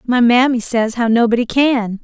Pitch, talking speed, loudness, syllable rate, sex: 240 Hz, 175 wpm, -14 LUFS, 4.7 syllables/s, female